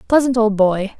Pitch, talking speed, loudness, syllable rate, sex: 220 Hz, 180 wpm, -16 LUFS, 4.8 syllables/s, female